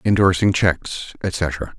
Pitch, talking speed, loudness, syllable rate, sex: 90 Hz, 100 wpm, -20 LUFS, 3.5 syllables/s, male